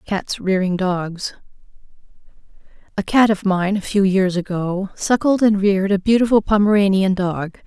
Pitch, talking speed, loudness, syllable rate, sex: 195 Hz, 135 wpm, -18 LUFS, 4.7 syllables/s, female